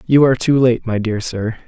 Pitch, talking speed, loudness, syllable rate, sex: 120 Hz, 250 wpm, -16 LUFS, 5.4 syllables/s, male